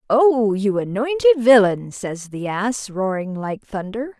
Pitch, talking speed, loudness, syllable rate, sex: 220 Hz, 145 wpm, -19 LUFS, 3.9 syllables/s, female